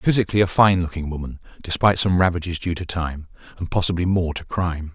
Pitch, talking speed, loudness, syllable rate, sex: 85 Hz, 195 wpm, -21 LUFS, 6.4 syllables/s, male